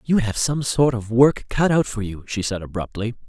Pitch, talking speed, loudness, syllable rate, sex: 120 Hz, 240 wpm, -21 LUFS, 5.0 syllables/s, male